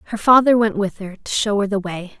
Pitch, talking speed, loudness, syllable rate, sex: 210 Hz, 275 wpm, -17 LUFS, 6.0 syllables/s, female